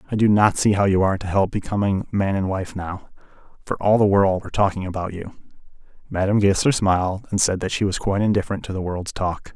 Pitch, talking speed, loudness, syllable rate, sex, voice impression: 95 Hz, 225 wpm, -21 LUFS, 6.3 syllables/s, male, very masculine, very adult-like, middle-aged, very thick, tensed, powerful, bright, slightly soft, slightly muffled, fluent, slightly raspy, very cool, slightly intellectual, slightly refreshing, sincere, calm, very mature, friendly, reassuring, slightly unique, wild